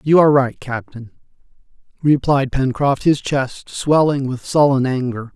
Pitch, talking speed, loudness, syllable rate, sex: 135 Hz, 135 wpm, -17 LUFS, 4.4 syllables/s, male